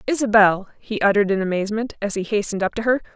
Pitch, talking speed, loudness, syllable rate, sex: 215 Hz, 210 wpm, -20 LUFS, 7.2 syllables/s, female